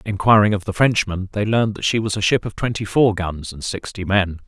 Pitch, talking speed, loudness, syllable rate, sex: 100 Hz, 240 wpm, -19 LUFS, 5.5 syllables/s, male